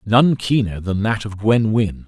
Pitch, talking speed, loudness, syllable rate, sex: 110 Hz, 200 wpm, -18 LUFS, 4.1 syllables/s, male